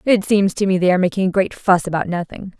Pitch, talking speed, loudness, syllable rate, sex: 190 Hz, 275 wpm, -17 LUFS, 6.6 syllables/s, female